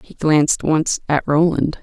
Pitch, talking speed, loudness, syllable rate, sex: 155 Hz, 165 wpm, -17 LUFS, 4.2 syllables/s, female